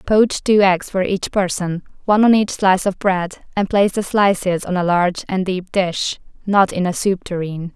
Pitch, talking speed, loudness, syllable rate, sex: 190 Hz, 210 wpm, -18 LUFS, 4.5 syllables/s, female